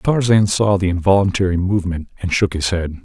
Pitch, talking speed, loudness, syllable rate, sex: 95 Hz, 180 wpm, -17 LUFS, 5.8 syllables/s, male